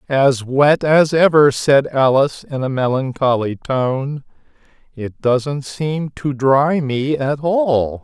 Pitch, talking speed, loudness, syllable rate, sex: 140 Hz, 135 wpm, -16 LUFS, 3.3 syllables/s, male